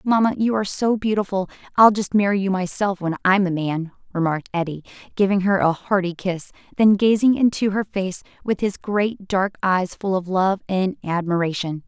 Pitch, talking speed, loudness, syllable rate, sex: 195 Hz, 180 wpm, -21 LUFS, 5.1 syllables/s, female